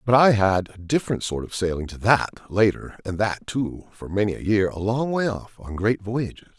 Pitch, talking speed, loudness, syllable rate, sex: 105 Hz, 230 wpm, -23 LUFS, 5.2 syllables/s, male